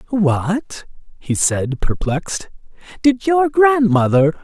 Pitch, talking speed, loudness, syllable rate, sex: 200 Hz, 95 wpm, -17 LUFS, 3.4 syllables/s, male